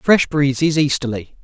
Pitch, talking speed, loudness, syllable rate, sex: 140 Hz, 125 wpm, -17 LUFS, 4.4 syllables/s, male